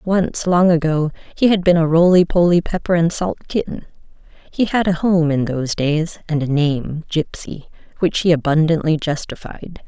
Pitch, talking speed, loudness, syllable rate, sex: 165 Hz, 170 wpm, -17 LUFS, 4.7 syllables/s, female